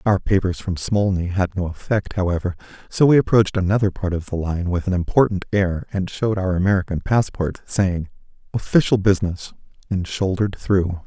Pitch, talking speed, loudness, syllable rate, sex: 95 Hz, 170 wpm, -20 LUFS, 5.5 syllables/s, male